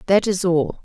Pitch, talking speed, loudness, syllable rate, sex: 180 Hz, 215 wpm, -19 LUFS, 4.7 syllables/s, female